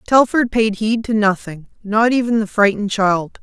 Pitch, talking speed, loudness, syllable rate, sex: 215 Hz, 175 wpm, -16 LUFS, 4.8 syllables/s, female